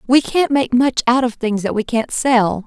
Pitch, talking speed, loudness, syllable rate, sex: 245 Hz, 245 wpm, -16 LUFS, 4.7 syllables/s, female